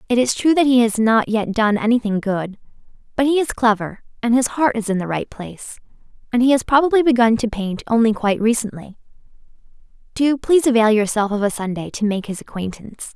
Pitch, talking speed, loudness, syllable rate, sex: 230 Hz, 200 wpm, -18 LUFS, 5.9 syllables/s, female